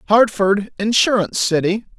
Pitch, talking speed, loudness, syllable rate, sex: 205 Hz, 90 wpm, -17 LUFS, 4.9 syllables/s, male